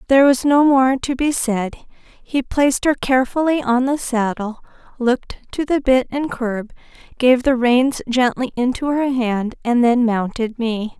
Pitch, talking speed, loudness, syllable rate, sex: 250 Hz, 170 wpm, -18 LUFS, 4.3 syllables/s, female